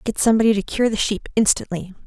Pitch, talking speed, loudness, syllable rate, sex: 210 Hz, 205 wpm, -19 LUFS, 6.7 syllables/s, female